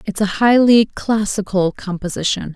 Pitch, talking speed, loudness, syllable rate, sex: 205 Hz, 120 wpm, -16 LUFS, 4.5 syllables/s, female